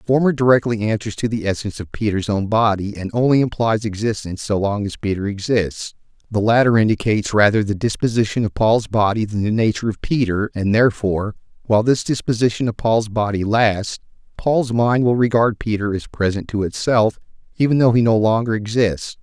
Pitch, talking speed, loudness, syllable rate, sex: 110 Hz, 180 wpm, -18 LUFS, 5.7 syllables/s, male